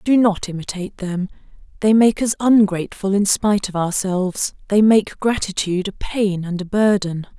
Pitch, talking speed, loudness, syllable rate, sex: 200 Hz, 160 wpm, -18 LUFS, 5.0 syllables/s, female